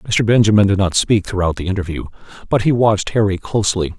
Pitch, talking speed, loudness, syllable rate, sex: 100 Hz, 195 wpm, -16 LUFS, 6.2 syllables/s, male